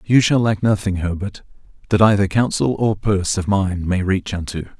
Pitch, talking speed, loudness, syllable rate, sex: 100 Hz, 190 wpm, -18 LUFS, 5.1 syllables/s, male